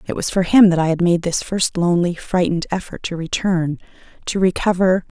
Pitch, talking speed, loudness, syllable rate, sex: 180 Hz, 195 wpm, -18 LUFS, 5.6 syllables/s, female